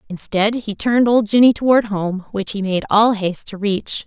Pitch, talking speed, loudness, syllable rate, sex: 210 Hz, 205 wpm, -17 LUFS, 5.0 syllables/s, female